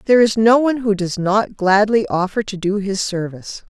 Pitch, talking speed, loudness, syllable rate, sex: 205 Hz, 210 wpm, -17 LUFS, 5.4 syllables/s, female